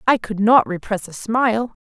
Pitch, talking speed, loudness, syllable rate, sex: 215 Hz, 200 wpm, -18 LUFS, 4.9 syllables/s, female